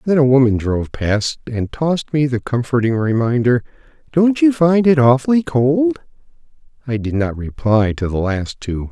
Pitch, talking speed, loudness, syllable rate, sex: 130 Hz, 170 wpm, -17 LUFS, 4.7 syllables/s, male